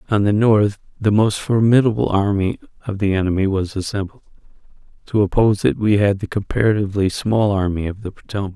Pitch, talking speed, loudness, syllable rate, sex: 100 Hz, 170 wpm, -18 LUFS, 6.0 syllables/s, male